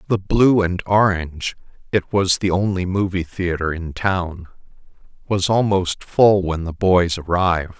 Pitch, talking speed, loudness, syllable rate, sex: 90 Hz, 130 wpm, -19 LUFS, 4.2 syllables/s, male